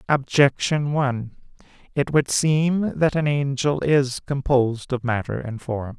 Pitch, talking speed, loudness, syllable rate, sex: 135 Hz, 140 wpm, -22 LUFS, 4.1 syllables/s, male